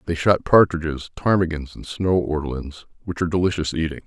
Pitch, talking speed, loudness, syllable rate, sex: 85 Hz, 165 wpm, -21 LUFS, 5.9 syllables/s, male